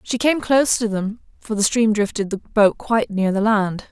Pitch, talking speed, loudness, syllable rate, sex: 215 Hz, 230 wpm, -19 LUFS, 5.0 syllables/s, female